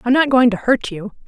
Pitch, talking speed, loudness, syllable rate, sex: 235 Hz, 285 wpm, -15 LUFS, 5.6 syllables/s, female